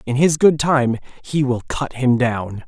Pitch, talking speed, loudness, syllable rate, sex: 130 Hz, 200 wpm, -18 LUFS, 4.1 syllables/s, male